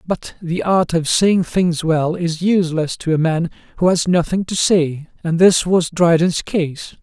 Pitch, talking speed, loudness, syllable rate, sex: 170 Hz, 190 wpm, -17 LUFS, 4.1 syllables/s, male